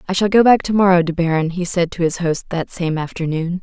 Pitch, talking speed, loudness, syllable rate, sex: 175 Hz, 265 wpm, -17 LUFS, 5.8 syllables/s, female